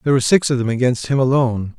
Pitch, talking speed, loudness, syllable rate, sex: 125 Hz, 270 wpm, -17 LUFS, 7.7 syllables/s, male